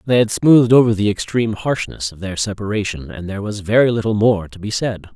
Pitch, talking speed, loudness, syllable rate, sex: 105 Hz, 220 wpm, -17 LUFS, 6.1 syllables/s, male